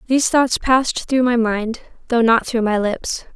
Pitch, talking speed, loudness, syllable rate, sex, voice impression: 235 Hz, 195 wpm, -18 LUFS, 4.7 syllables/s, female, feminine, slightly young, slightly cute, friendly, kind